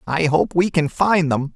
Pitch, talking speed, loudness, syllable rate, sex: 160 Hz, 230 wpm, -18 LUFS, 4.3 syllables/s, male